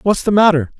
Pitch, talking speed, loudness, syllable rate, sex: 185 Hz, 230 wpm, -13 LUFS, 6.4 syllables/s, male